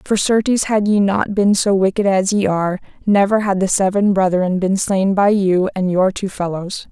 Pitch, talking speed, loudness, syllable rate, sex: 195 Hz, 210 wpm, -16 LUFS, 4.8 syllables/s, female